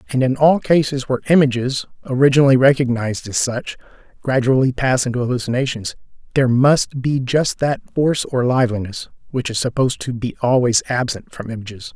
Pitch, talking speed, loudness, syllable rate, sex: 130 Hz, 155 wpm, -18 LUFS, 5.8 syllables/s, male